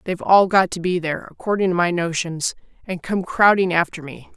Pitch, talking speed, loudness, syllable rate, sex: 180 Hz, 205 wpm, -19 LUFS, 5.6 syllables/s, female